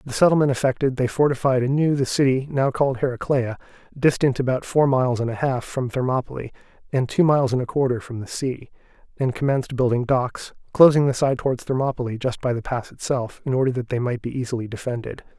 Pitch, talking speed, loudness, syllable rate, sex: 130 Hz, 200 wpm, -22 LUFS, 6.2 syllables/s, male